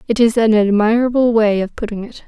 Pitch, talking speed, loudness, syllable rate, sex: 220 Hz, 210 wpm, -15 LUFS, 5.7 syllables/s, female